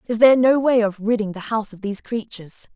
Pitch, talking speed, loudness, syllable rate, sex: 220 Hz, 240 wpm, -19 LUFS, 6.6 syllables/s, female